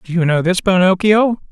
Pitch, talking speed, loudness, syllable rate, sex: 185 Hz, 200 wpm, -14 LUFS, 5.2 syllables/s, male